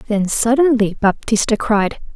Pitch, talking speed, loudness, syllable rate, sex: 225 Hz, 110 wpm, -16 LUFS, 4.2 syllables/s, female